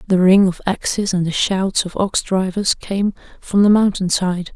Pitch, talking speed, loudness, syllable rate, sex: 190 Hz, 200 wpm, -17 LUFS, 4.4 syllables/s, female